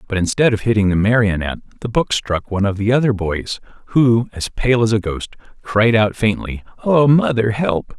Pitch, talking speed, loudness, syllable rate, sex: 110 Hz, 195 wpm, -17 LUFS, 5.2 syllables/s, male